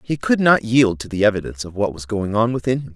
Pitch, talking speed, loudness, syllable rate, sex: 110 Hz, 285 wpm, -19 LUFS, 6.3 syllables/s, male